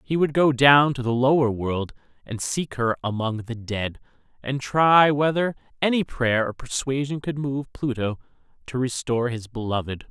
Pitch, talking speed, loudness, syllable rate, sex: 130 Hz, 165 wpm, -23 LUFS, 4.6 syllables/s, male